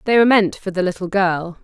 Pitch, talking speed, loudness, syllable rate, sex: 190 Hz, 255 wpm, -17 LUFS, 6.1 syllables/s, female